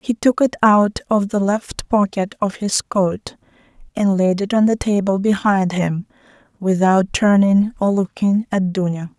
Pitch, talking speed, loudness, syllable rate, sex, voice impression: 200 Hz, 165 wpm, -18 LUFS, 4.2 syllables/s, female, feminine, adult-like, slightly intellectual, slightly calm, slightly kind